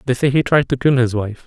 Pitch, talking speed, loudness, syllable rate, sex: 130 Hz, 330 wpm, -17 LUFS, 6.1 syllables/s, male